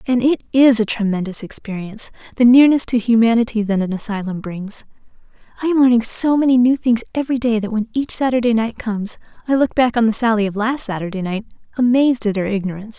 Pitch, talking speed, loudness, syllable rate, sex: 230 Hz, 200 wpm, -17 LUFS, 6.3 syllables/s, female